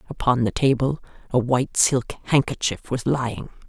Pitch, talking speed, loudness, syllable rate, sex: 125 Hz, 145 wpm, -22 LUFS, 5.0 syllables/s, female